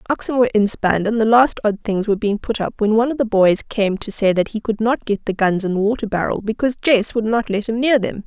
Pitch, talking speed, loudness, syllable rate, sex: 220 Hz, 285 wpm, -18 LUFS, 6.1 syllables/s, female